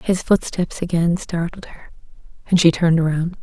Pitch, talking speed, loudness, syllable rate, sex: 170 Hz, 160 wpm, -19 LUFS, 4.7 syllables/s, female